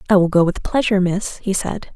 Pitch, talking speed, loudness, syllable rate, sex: 190 Hz, 245 wpm, -18 LUFS, 6.0 syllables/s, female